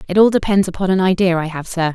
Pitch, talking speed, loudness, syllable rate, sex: 180 Hz, 280 wpm, -16 LUFS, 6.7 syllables/s, female